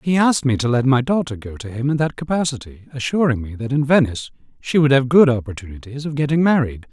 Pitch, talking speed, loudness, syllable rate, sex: 135 Hz, 225 wpm, -18 LUFS, 6.4 syllables/s, male